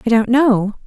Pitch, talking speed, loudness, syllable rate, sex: 235 Hz, 210 wpm, -15 LUFS, 4.8 syllables/s, female